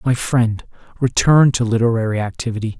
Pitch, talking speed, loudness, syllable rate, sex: 115 Hz, 130 wpm, -17 LUFS, 5.6 syllables/s, male